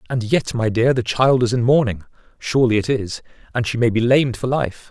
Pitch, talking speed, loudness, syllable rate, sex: 120 Hz, 210 wpm, -18 LUFS, 5.7 syllables/s, male